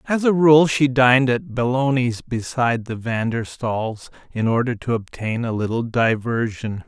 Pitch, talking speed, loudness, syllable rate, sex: 120 Hz, 165 wpm, -20 LUFS, 4.5 syllables/s, male